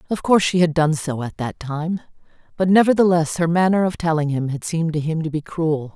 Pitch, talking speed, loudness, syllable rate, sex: 165 Hz, 230 wpm, -20 LUFS, 5.8 syllables/s, female